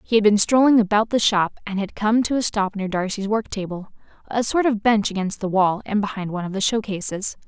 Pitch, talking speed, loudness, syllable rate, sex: 205 Hz, 235 wpm, -21 LUFS, 5.7 syllables/s, female